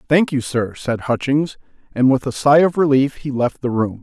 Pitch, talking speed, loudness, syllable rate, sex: 135 Hz, 225 wpm, -18 LUFS, 4.8 syllables/s, male